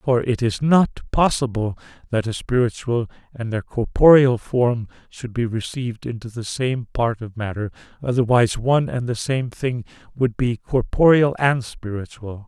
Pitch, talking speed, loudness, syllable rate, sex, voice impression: 120 Hz, 155 wpm, -21 LUFS, 4.6 syllables/s, male, very masculine, very adult-like, old, very thick, tensed, powerful, slightly dark, soft, muffled, slightly fluent, slightly cool, very intellectual, sincere, slightly calm, friendly, slightly reassuring, unique, slightly elegant, slightly wild, slightly sweet, lively, very kind, slightly intense, modest